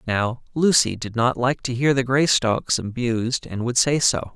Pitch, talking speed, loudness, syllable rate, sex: 125 Hz, 195 wpm, -21 LUFS, 4.4 syllables/s, male